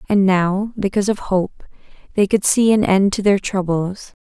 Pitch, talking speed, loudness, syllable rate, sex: 195 Hz, 185 wpm, -17 LUFS, 4.9 syllables/s, female